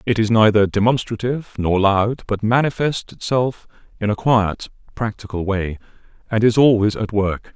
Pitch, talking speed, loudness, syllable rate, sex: 110 Hz, 150 wpm, -19 LUFS, 4.8 syllables/s, male